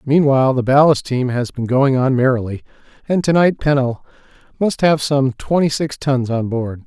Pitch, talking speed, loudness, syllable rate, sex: 135 Hz, 185 wpm, -16 LUFS, 4.9 syllables/s, male